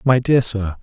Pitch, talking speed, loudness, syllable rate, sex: 115 Hz, 215 wpm, -17 LUFS, 4.3 syllables/s, male